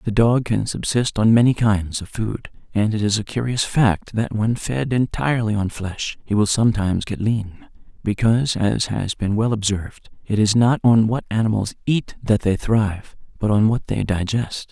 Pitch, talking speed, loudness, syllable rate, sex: 110 Hz, 190 wpm, -20 LUFS, 4.8 syllables/s, male